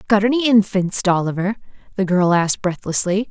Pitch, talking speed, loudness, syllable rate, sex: 195 Hz, 145 wpm, -18 LUFS, 5.5 syllables/s, female